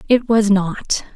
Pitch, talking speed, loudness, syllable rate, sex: 210 Hz, 155 wpm, -17 LUFS, 3.4 syllables/s, female